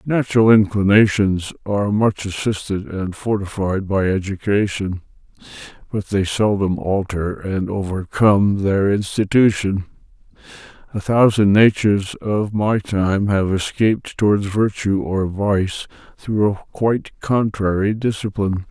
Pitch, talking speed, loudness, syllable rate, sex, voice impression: 100 Hz, 110 wpm, -18 LUFS, 4.2 syllables/s, male, very masculine, old, thick, slightly muffled, very calm, slightly mature, slightly wild